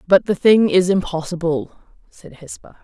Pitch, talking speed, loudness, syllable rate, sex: 180 Hz, 150 wpm, -17 LUFS, 4.7 syllables/s, female